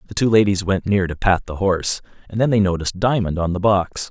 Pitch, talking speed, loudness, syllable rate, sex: 95 Hz, 250 wpm, -19 LUFS, 6.0 syllables/s, male